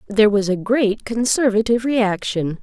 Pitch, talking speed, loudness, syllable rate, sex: 215 Hz, 135 wpm, -18 LUFS, 4.9 syllables/s, female